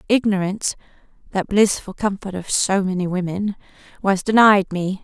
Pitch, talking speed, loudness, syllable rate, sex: 195 Hz, 105 wpm, -19 LUFS, 5.0 syllables/s, female